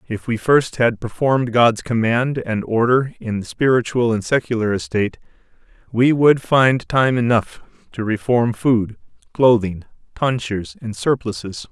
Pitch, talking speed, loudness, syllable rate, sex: 115 Hz, 140 wpm, -18 LUFS, 4.5 syllables/s, male